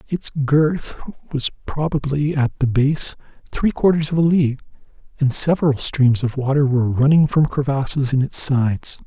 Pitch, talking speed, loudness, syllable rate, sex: 140 Hz, 160 wpm, -18 LUFS, 4.7 syllables/s, male